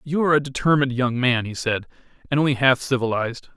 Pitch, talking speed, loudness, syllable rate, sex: 130 Hz, 200 wpm, -21 LUFS, 6.7 syllables/s, male